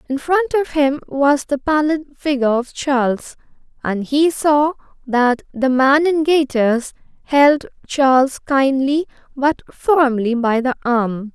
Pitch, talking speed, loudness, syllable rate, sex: 275 Hz, 135 wpm, -17 LUFS, 3.7 syllables/s, female